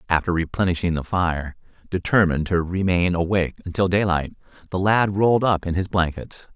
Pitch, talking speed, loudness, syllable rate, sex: 90 Hz, 155 wpm, -21 LUFS, 5.6 syllables/s, male